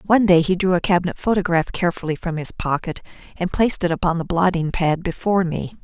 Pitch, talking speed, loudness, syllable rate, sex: 175 Hz, 205 wpm, -20 LUFS, 6.4 syllables/s, female